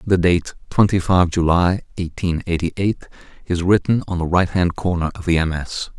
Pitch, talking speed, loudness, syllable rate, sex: 90 Hz, 170 wpm, -19 LUFS, 4.9 syllables/s, male